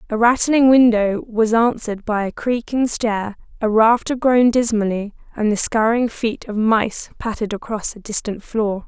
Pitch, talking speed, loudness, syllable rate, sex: 225 Hz, 160 wpm, -18 LUFS, 4.7 syllables/s, female